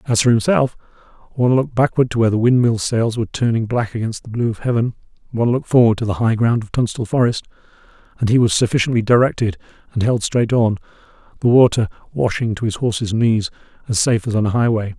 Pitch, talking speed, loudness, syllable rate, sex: 115 Hz, 200 wpm, -17 LUFS, 6.4 syllables/s, male